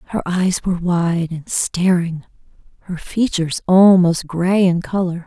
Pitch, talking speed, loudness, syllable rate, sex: 175 Hz, 135 wpm, -17 LUFS, 4.0 syllables/s, female